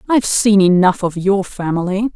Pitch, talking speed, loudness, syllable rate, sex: 195 Hz, 165 wpm, -15 LUFS, 5.1 syllables/s, female